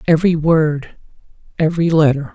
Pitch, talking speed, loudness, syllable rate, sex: 160 Hz, 75 wpm, -15 LUFS, 5.5 syllables/s, male